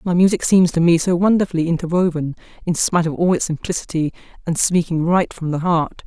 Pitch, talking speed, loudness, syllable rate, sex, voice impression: 170 Hz, 200 wpm, -18 LUFS, 6.0 syllables/s, female, feminine, bright, slightly soft, clear, fluent, intellectual, slightly refreshing, calm, slightly friendly, unique, elegant, lively, slightly sharp